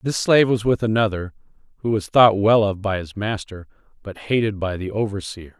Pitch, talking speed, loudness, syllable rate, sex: 105 Hz, 195 wpm, -20 LUFS, 5.4 syllables/s, male